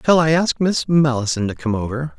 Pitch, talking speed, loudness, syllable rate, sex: 135 Hz, 220 wpm, -18 LUFS, 5.4 syllables/s, male